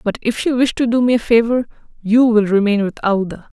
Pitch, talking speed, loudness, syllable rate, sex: 225 Hz, 235 wpm, -16 LUFS, 6.0 syllables/s, female